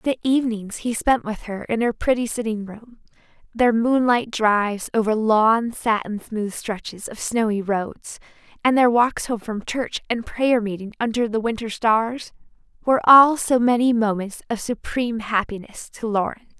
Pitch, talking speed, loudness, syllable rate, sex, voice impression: 225 Hz, 165 wpm, -21 LUFS, 4.6 syllables/s, female, very feminine, very young, very thin, very tensed, powerful, very bright, hard, very clear, very fluent, slightly raspy, very cute, intellectual, very refreshing, sincere, very friendly, very reassuring, unique, elegant, slightly wild, sweet, very lively, slightly strict, intense, slightly sharp, light